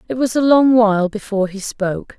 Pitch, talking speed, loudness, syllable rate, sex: 220 Hz, 220 wpm, -16 LUFS, 6.0 syllables/s, female